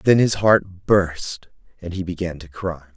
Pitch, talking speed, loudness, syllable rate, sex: 90 Hz, 180 wpm, -21 LUFS, 4.0 syllables/s, male